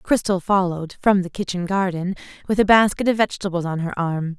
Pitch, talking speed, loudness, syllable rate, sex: 185 Hz, 190 wpm, -20 LUFS, 5.0 syllables/s, female